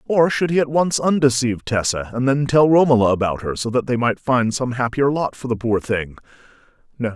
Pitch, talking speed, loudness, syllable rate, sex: 125 Hz, 210 wpm, -19 LUFS, 5.5 syllables/s, male